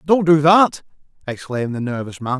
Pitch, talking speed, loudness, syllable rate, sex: 145 Hz, 175 wpm, -17 LUFS, 5.3 syllables/s, male